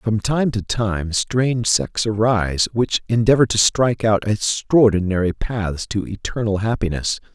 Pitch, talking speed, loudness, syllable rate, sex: 110 Hz, 140 wpm, -19 LUFS, 4.4 syllables/s, male